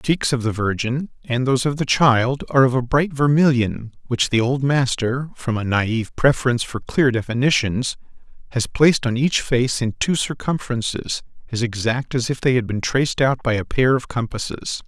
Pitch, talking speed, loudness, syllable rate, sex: 125 Hz, 195 wpm, -20 LUFS, 5.2 syllables/s, male